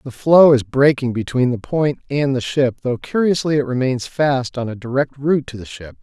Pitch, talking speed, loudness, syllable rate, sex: 135 Hz, 220 wpm, -17 LUFS, 5.1 syllables/s, male